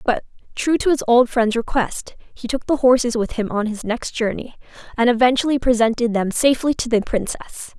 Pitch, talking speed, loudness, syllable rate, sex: 240 Hz, 195 wpm, -19 LUFS, 5.3 syllables/s, female